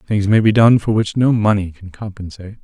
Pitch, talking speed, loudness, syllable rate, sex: 105 Hz, 230 wpm, -14 LUFS, 5.5 syllables/s, male